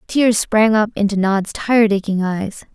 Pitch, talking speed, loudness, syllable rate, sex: 210 Hz, 175 wpm, -16 LUFS, 4.5 syllables/s, female